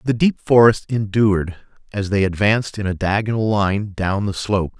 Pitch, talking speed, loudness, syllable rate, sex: 105 Hz, 175 wpm, -18 LUFS, 5.1 syllables/s, male